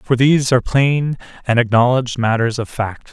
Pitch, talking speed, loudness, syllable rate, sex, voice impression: 125 Hz, 175 wpm, -16 LUFS, 5.5 syllables/s, male, very masculine, slightly adult-like, slightly thick, relaxed, slightly weak, bright, soft, clear, fluent, cool, very intellectual, refreshing, very sincere, very calm, slightly mature, friendly, reassuring, slightly unique, slightly elegant, wild, sweet, lively, kind, slightly modest